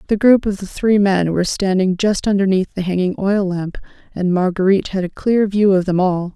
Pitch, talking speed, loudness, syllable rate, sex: 190 Hz, 215 wpm, -17 LUFS, 5.5 syllables/s, female